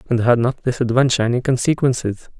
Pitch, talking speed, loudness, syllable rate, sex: 125 Hz, 175 wpm, -18 LUFS, 6.6 syllables/s, male